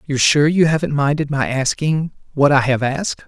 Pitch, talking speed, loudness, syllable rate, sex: 145 Hz, 185 wpm, -17 LUFS, 5.4 syllables/s, male